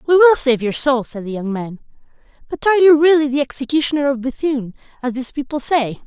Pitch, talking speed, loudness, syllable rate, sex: 270 Hz, 210 wpm, -17 LUFS, 6.3 syllables/s, female